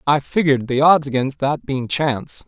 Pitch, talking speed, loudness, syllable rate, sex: 140 Hz, 195 wpm, -18 LUFS, 5.2 syllables/s, male